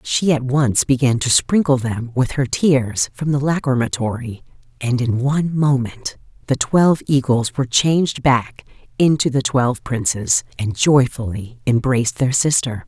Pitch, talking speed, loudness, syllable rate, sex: 130 Hz, 150 wpm, -18 LUFS, 4.5 syllables/s, female